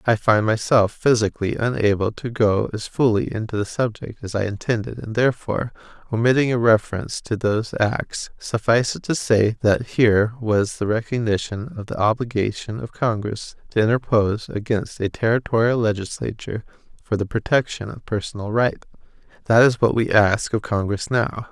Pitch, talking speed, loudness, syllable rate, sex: 110 Hz, 160 wpm, -21 LUFS, 5.3 syllables/s, male